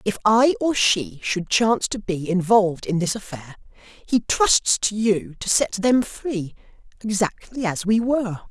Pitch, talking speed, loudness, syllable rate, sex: 205 Hz, 170 wpm, -21 LUFS, 4.2 syllables/s, male